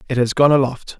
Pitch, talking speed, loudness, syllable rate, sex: 130 Hz, 240 wpm, -16 LUFS, 6.2 syllables/s, male